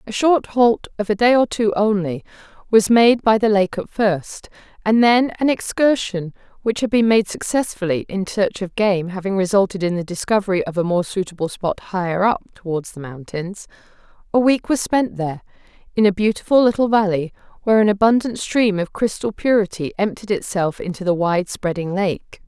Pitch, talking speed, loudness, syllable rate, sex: 200 Hz, 180 wpm, -19 LUFS, 5.1 syllables/s, female